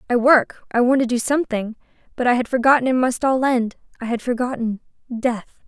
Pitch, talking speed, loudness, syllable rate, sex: 245 Hz, 190 wpm, -19 LUFS, 5.9 syllables/s, female